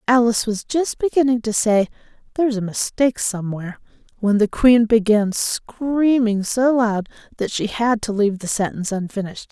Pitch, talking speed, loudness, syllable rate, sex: 225 Hz, 160 wpm, -19 LUFS, 5.3 syllables/s, female